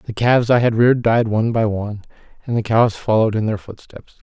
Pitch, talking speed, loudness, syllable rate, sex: 110 Hz, 220 wpm, -17 LUFS, 6.4 syllables/s, male